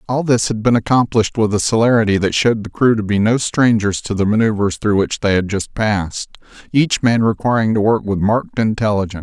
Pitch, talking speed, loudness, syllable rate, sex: 110 Hz, 215 wpm, -16 LUFS, 5.9 syllables/s, male